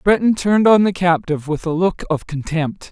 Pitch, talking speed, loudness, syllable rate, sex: 175 Hz, 205 wpm, -17 LUFS, 5.5 syllables/s, male